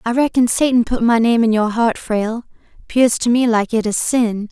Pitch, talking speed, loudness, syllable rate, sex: 230 Hz, 225 wpm, -16 LUFS, 5.0 syllables/s, female